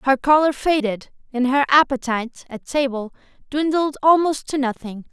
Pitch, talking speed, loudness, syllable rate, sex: 270 Hz, 140 wpm, -19 LUFS, 5.0 syllables/s, female